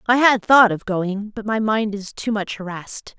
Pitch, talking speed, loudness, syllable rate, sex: 210 Hz, 225 wpm, -19 LUFS, 4.6 syllables/s, female